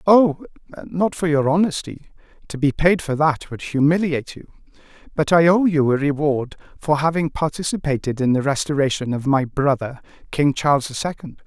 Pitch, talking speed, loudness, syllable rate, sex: 150 Hz, 165 wpm, -20 LUFS, 5.2 syllables/s, male